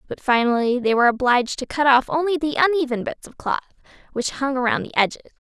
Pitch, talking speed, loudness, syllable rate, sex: 260 Hz, 210 wpm, -20 LUFS, 6.7 syllables/s, female